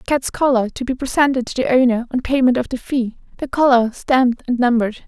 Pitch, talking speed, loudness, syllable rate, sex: 250 Hz, 225 wpm, -17 LUFS, 6.1 syllables/s, female